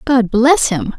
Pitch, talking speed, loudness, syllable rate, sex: 240 Hz, 180 wpm, -13 LUFS, 3.4 syllables/s, female